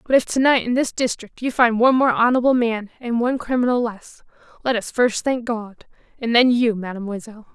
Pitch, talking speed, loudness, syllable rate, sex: 235 Hz, 200 wpm, -19 LUFS, 5.8 syllables/s, female